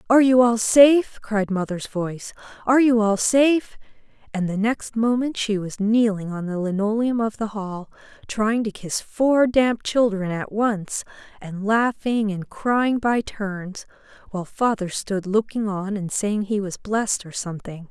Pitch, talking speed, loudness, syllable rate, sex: 215 Hz, 170 wpm, -21 LUFS, 4.4 syllables/s, female